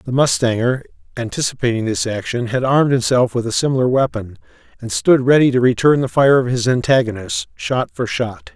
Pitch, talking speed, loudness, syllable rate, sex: 125 Hz, 175 wpm, -17 LUFS, 5.6 syllables/s, male